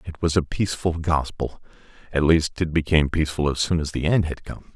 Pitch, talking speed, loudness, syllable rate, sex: 80 Hz, 215 wpm, -23 LUFS, 5.9 syllables/s, male